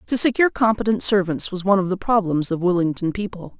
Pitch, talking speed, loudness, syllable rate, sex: 195 Hz, 200 wpm, -20 LUFS, 6.4 syllables/s, female